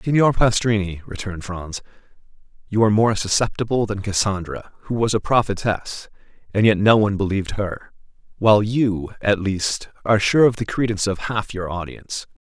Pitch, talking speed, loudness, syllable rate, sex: 105 Hz, 160 wpm, -20 LUFS, 5.5 syllables/s, male